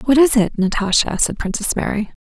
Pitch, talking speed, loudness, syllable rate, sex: 225 Hz, 190 wpm, -17 LUFS, 5.2 syllables/s, female